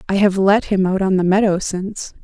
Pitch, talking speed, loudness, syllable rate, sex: 195 Hz, 240 wpm, -17 LUFS, 5.5 syllables/s, female